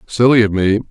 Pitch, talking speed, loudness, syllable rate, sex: 110 Hz, 200 wpm, -13 LUFS, 5.9 syllables/s, male